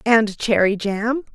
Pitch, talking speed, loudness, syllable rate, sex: 220 Hz, 135 wpm, -19 LUFS, 3.5 syllables/s, female